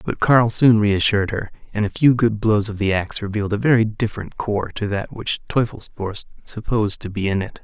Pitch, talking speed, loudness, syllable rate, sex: 105 Hz, 210 wpm, -20 LUFS, 5.6 syllables/s, male